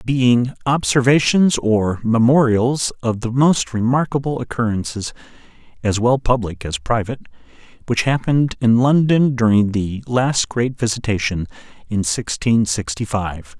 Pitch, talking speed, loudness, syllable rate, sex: 120 Hz, 120 wpm, -18 LUFS, 4.4 syllables/s, male